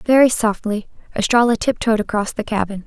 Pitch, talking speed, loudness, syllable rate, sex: 220 Hz, 145 wpm, -18 LUFS, 5.5 syllables/s, female